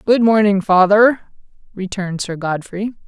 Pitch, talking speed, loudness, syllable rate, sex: 200 Hz, 115 wpm, -16 LUFS, 4.8 syllables/s, female